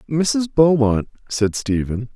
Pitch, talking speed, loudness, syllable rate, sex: 130 Hz, 110 wpm, -19 LUFS, 3.7 syllables/s, male